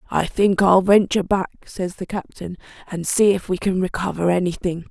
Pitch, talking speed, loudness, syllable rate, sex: 185 Hz, 185 wpm, -20 LUFS, 5.1 syllables/s, female